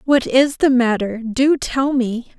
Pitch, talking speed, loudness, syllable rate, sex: 250 Hz, 150 wpm, -17 LUFS, 3.7 syllables/s, female